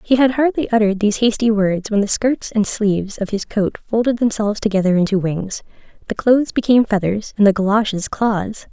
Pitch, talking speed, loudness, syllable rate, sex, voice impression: 215 Hz, 195 wpm, -17 LUFS, 5.7 syllables/s, female, feminine, adult-like, tensed, powerful, soft, clear, fluent, intellectual, calm, friendly, reassuring, elegant, kind, slightly modest